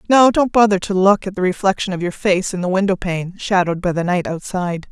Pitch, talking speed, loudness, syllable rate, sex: 190 Hz, 245 wpm, -17 LUFS, 6.0 syllables/s, female